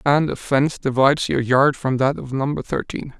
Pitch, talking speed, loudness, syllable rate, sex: 135 Hz, 205 wpm, -19 LUFS, 4.9 syllables/s, male